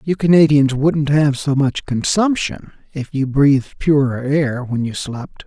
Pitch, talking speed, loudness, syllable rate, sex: 140 Hz, 165 wpm, -16 LUFS, 4.1 syllables/s, male